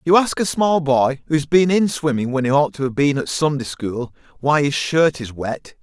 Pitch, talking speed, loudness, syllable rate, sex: 145 Hz, 245 wpm, -19 LUFS, 4.9 syllables/s, male